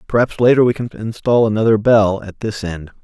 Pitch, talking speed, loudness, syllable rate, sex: 110 Hz, 195 wpm, -16 LUFS, 5.4 syllables/s, male